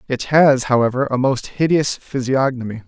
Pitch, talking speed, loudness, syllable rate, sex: 130 Hz, 145 wpm, -17 LUFS, 4.9 syllables/s, male